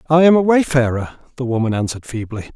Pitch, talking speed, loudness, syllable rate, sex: 135 Hz, 190 wpm, -17 LUFS, 6.5 syllables/s, male